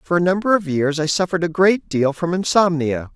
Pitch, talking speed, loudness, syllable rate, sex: 170 Hz, 230 wpm, -18 LUFS, 5.6 syllables/s, male